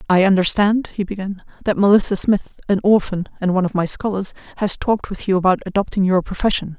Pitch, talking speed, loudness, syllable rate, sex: 195 Hz, 195 wpm, -18 LUFS, 6.1 syllables/s, female